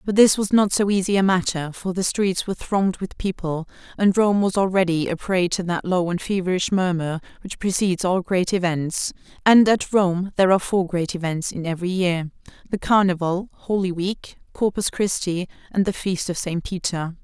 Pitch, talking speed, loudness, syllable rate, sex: 185 Hz, 190 wpm, -21 LUFS, 5.2 syllables/s, female